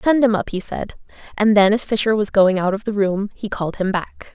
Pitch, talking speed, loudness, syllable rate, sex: 205 Hz, 265 wpm, -19 LUFS, 5.5 syllables/s, female